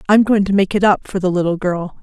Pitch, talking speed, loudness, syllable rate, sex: 190 Hz, 295 wpm, -16 LUFS, 6.0 syllables/s, female